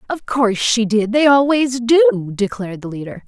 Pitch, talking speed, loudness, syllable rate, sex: 235 Hz, 165 wpm, -16 LUFS, 5.0 syllables/s, female